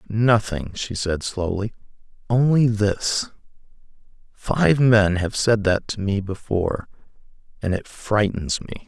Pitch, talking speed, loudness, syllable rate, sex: 105 Hz, 120 wpm, -21 LUFS, 3.9 syllables/s, male